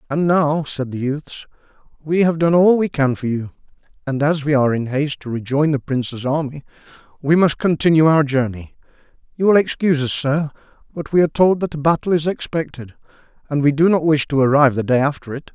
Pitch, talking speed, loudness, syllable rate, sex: 150 Hz, 210 wpm, -18 LUFS, 5.9 syllables/s, male